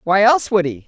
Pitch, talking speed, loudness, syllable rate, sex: 200 Hz, 275 wpm, -15 LUFS, 6.5 syllables/s, female